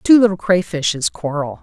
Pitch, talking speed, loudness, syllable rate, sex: 165 Hz, 145 wpm, -17 LUFS, 5.1 syllables/s, female